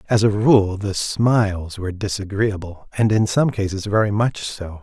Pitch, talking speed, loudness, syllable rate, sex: 100 Hz, 175 wpm, -20 LUFS, 4.6 syllables/s, male